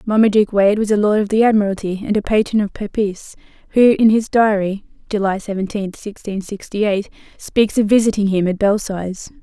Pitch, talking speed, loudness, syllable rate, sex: 205 Hz, 170 wpm, -17 LUFS, 4.7 syllables/s, female